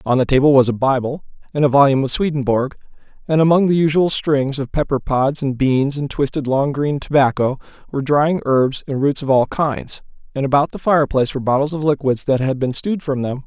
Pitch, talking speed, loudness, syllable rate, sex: 140 Hz, 215 wpm, -17 LUFS, 5.9 syllables/s, male